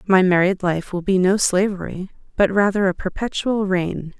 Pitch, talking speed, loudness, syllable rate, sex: 190 Hz, 170 wpm, -19 LUFS, 4.8 syllables/s, female